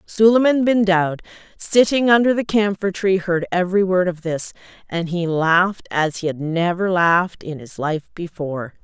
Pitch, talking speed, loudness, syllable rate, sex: 180 Hz, 170 wpm, -18 LUFS, 4.7 syllables/s, female